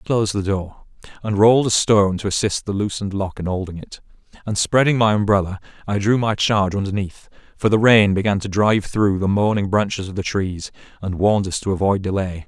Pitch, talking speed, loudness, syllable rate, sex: 100 Hz, 210 wpm, -19 LUFS, 6.0 syllables/s, male